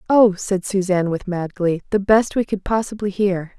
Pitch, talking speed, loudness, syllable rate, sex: 195 Hz, 200 wpm, -19 LUFS, 4.9 syllables/s, female